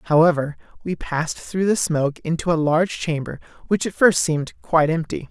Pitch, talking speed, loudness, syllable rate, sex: 165 Hz, 180 wpm, -21 LUFS, 5.5 syllables/s, male